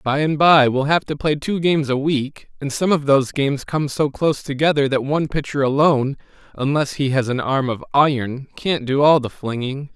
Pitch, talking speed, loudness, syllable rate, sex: 140 Hz, 215 wpm, -19 LUFS, 5.3 syllables/s, male